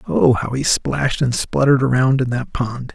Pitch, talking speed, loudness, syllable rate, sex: 125 Hz, 205 wpm, -18 LUFS, 5.0 syllables/s, male